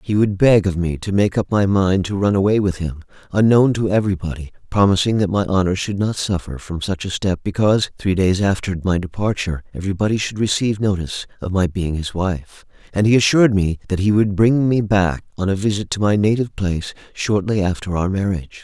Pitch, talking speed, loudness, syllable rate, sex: 95 Hz, 210 wpm, -18 LUFS, 5.8 syllables/s, male